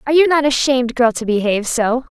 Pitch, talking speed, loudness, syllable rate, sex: 255 Hz, 225 wpm, -16 LUFS, 6.7 syllables/s, female